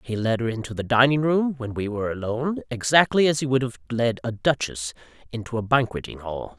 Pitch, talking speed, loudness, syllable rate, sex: 120 Hz, 210 wpm, -23 LUFS, 5.8 syllables/s, male